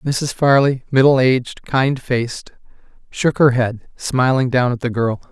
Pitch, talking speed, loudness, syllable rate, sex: 130 Hz, 160 wpm, -17 LUFS, 4.2 syllables/s, male